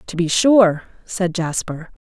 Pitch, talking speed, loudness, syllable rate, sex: 180 Hz, 145 wpm, -17 LUFS, 3.7 syllables/s, female